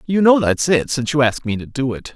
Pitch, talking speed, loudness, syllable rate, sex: 140 Hz, 305 wpm, -17 LUFS, 6.0 syllables/s, male